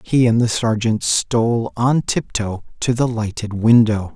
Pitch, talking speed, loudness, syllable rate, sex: 115 Hz, 160 wpm, -18 LUFS, 4.1 syllables/s, male